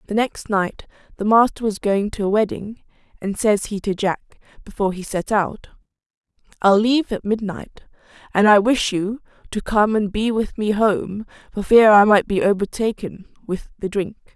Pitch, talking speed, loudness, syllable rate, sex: 205 Hz, 180 wpm, -19 LUFS, 4.9 syllables/s, female